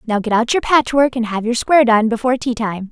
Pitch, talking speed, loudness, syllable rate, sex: 235 Hz, 245 wpm, -16 LUFS, 6.4 syllables/s, female